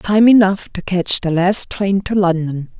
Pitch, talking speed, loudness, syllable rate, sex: 190 Hz, 195 wpm, -15 LUFS, 4.1 syllables/s, female